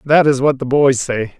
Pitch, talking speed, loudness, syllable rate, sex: 135 Hz, 260 wpm, -15 LUFS, 4.7 syllables/s, male